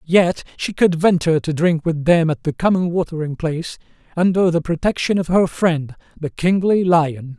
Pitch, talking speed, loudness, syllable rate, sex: 170 Hz, 180 wpm, -18 LUFS, 4.9 syllables/s, male